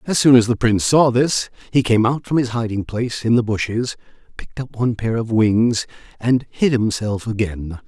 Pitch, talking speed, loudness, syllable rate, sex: 115 Hz, 205 wpm, -18 LUFS, 5.2 syllables/s, male